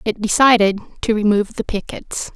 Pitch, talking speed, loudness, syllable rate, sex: 215 Hz, 155 wpm, -17 LUFS, 5.5 syllables/s, female